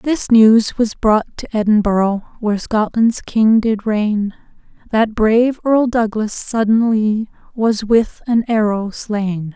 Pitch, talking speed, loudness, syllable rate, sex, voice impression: 220 Hz, 130 wpm, -16 LUFS, 4.2 syllables/s, female, feminine, adult-like, tensed, slightly powerful, soft, clear, intellectual, calm, friendly, reassuring, elegant, kind, modest